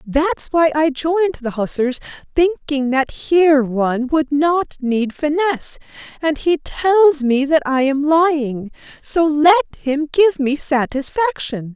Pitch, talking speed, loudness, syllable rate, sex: 295 Hz, 140 wpm, -17 LUFS, 4.0 syllables/s, female